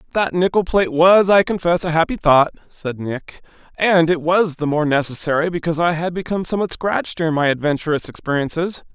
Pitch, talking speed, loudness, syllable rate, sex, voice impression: 165 Hz, 180 wpm, -18 LUFS, 6.0 syllables/s, male, masculine, adult-like, unique, slightly intense